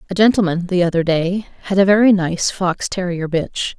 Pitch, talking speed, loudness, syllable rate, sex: 180 Hz, 190 wpm, -17 LUFS, 5.0 syllables/s, female